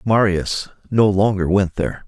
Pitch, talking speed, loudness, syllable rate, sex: 100 Hz, 145 wpm, -18 LUFS, 4.6 syllables/s, male